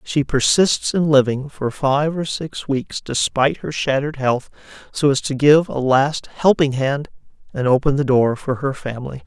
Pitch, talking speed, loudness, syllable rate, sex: 140 Hz, 180 wpm, -18 LUFS, 4.6 syllables/s, male